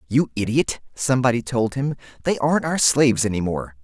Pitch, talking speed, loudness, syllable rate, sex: 125 Hz, 170 wpm, -21 LUFS, 5.7 syllables/s, male